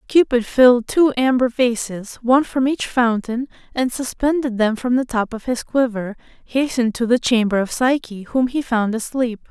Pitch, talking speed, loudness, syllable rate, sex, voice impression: 245 Hz, 175 wpm, -19 LUFS, 4.8 syllables/s, female, feminine, adult-like, clear, intellectual, slightly calm, slightly sweet